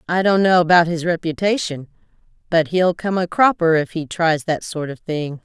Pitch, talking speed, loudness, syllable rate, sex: 170 Hz, 200 wpm, -18 LUFS, 4.9 syllables/s, female